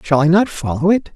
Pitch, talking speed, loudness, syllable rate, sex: 170 Hz, 260 wpm, -15 LUFS, 5.7 syllables/s, male